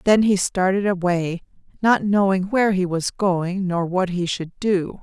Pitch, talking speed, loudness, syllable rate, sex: 190 Hz, 180 wpm, -20 LUFS, 4.3 syllables/s, female